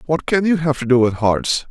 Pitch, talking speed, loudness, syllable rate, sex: 140 Hz, 280 wpm, -17 LUFS, 5.2 syllables/s, male